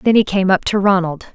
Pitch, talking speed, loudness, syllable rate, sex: 190 Hz, 265 wpm, -15 LUFS, 5.6 syllables/s, female